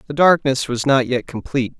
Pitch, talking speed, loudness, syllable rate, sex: 130 Hz, 200 wpm, -18 LUFS, 5.6 syllables/s, male